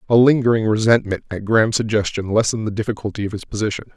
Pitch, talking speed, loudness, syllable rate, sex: 110 Hz, 180 wpm, -19 LUFS, 7.0 syllables/s, male